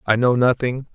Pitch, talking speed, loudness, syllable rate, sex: 125 Hz, 190 wpm, -19 LUFS, 5.3 syllables/s, male